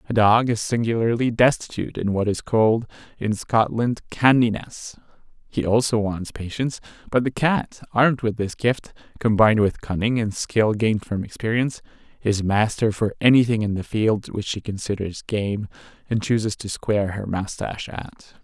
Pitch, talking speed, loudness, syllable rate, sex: 110 Hz, 160 wpm, -22 LUFS, 5.0 syllables/s, male